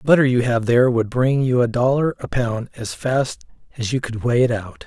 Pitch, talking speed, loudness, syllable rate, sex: 125 Hz, 245 wpm, -19 LUFS, 5.3 syllables/s, male